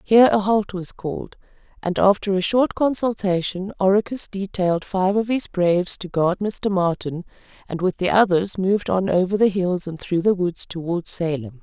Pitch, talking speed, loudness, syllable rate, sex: 190 Hz, 180 wpm, -21 LUFS, 4.9 syllables/s, female